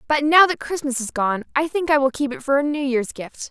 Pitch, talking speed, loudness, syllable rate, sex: 280 Hz, 290 wpm, -20 LUFS, 5.5 syllables/s, female